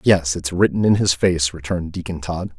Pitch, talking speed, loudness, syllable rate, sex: 85 Hz, 185 wpm, -19 LUFS, 5.3 syllables/s, male